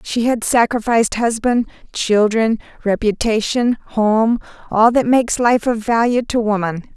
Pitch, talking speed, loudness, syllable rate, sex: 225 Hz, 130 wpm, -17 LUFS, 4.5 syllables/s, female